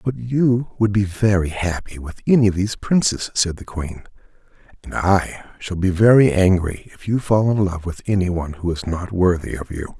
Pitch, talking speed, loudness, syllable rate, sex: 95 Hz, 200 wpm, -19 LUFS, 4.9 syllables/s, male